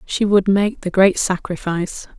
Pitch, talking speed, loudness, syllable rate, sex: 190 Hz, 165 wpm, -18 LUFS, 4.6 syllables/s, female